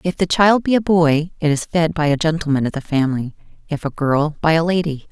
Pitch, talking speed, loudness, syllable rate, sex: 160 Hz, 245 wpm, -18 LUFS, 5.8 syllables/s, female